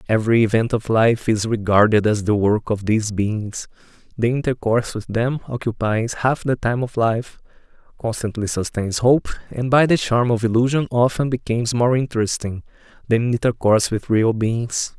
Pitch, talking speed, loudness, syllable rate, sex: 115 Hz, 160 wpm, -19 LUFS, 5.0 syllables/s, male